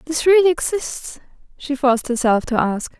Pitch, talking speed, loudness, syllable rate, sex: 280 Hz, 160 wpm, -18 LUFS, 5.0 syllables/s, female